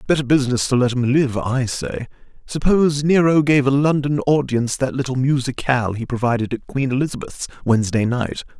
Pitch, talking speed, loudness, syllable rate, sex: 130 Hz, 175 wpm, -19 LUFS, 5.9 syllables/s, male